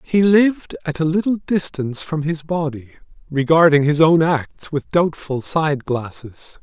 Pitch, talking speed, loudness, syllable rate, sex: 155 Hz, 155 wpm, -18 LUFS, 4.3 syllables/s, male